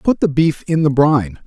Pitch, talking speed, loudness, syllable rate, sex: 145 Hz, 245 wpm, -15 LUFS, 5.2 syllables/s, male